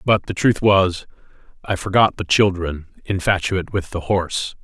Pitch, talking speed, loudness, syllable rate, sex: 95 Hz, 155 wpm, -19 LUFS, 4.8 syllables/s, male